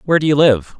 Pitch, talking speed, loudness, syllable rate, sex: 135 Hz, 300 wpm, -13 LUFS, 7.7 syllables/s, male